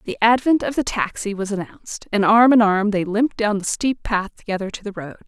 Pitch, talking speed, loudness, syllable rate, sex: 210 Hz, 240 wpm, -19 LUFS, 5.7 syllables/s, female